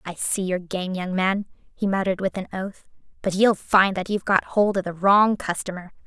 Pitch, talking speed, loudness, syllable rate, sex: 190 Hz, 220 wpm, -22 LUFS, 5.2 syllables/s, female